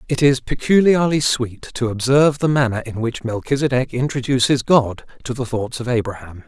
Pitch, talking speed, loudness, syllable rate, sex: 125 Hz, 165 wpm, -18 LUFS, 5.2 syllables/s, male